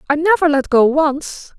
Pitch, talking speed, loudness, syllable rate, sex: 300 Hz, 190 wpm, -14 LUFS, 4.4 syllables/s, female